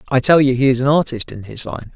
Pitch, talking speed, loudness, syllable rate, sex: 130 Hz, 305 wpm, -16 LUFS, 6.4 syllables/s, male